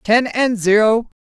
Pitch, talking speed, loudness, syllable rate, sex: 225 Hz, 145 wpm, -15 LUFS, 3.6 syllables/s, female